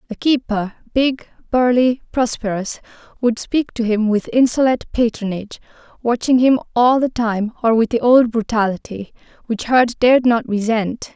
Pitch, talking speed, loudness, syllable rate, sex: 235 Hz, 135 wpm, -17 LUFS, 4.6 syllables/s, female